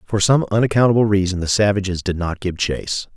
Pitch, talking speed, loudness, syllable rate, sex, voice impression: 100 Hz, 190 wpm, -18 LUFS, 6.1 syllables/s, male, very masculine, very middle-aged, very thick, tensed, powerful, slightly dark, soft, slightly muffled, fluent, cool, very intellectual, slightly refreshing, sincere, very calm, mature, very friendly, very reassuring, very unique, elegant, wild, very sweet, lively, kind, slightly intense, slightly modest